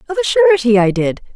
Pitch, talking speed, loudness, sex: 275 Hz, 220 wpm, -13 LUFS, female